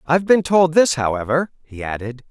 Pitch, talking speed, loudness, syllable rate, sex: 145 Hz, 180 wpm, -18 LUFS, 5.4 syllables/s, male